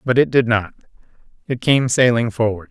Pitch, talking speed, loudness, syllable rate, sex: 120 Hz, 180 wpm, -17 LUFS, 5.3 syllables/s, male